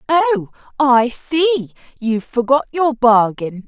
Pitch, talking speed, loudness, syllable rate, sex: 260 Hz, 115 wpm, -16 LUFS, 3.9 syllables/s, female